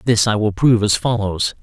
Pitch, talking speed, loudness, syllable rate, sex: 110 Hz, 220 wpm, -17 LUFS, 5.6 syllables/s, male